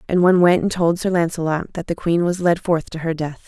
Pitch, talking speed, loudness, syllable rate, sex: 170 Hz, 275 wpm, -19 LUFS, 5.8 syllables/s, female